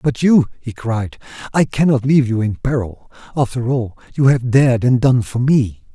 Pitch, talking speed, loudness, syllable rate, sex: 125 Hz, 190 wpm, -16 LUFS, 4.8 syllables/s, male